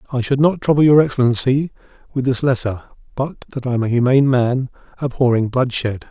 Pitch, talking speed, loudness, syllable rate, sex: 130 Hz, 175 wpm, -17 LUFS, 5.9 syllables/s, male